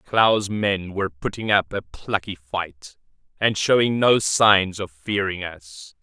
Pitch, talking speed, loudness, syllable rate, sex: 95 Hz, 150 wpm, -21 LUFS, 3.6 syllables/s, male